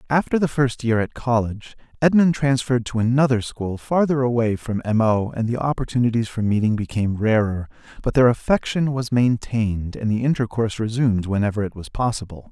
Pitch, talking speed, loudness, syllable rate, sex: 120 Hz, 175 wpm, -21 LUFS, 5.9 syllables/s, male